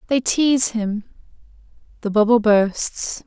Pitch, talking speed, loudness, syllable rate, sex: 225 Hz, 110 wpm, -18 LUFS, 3.8 syllables/s, female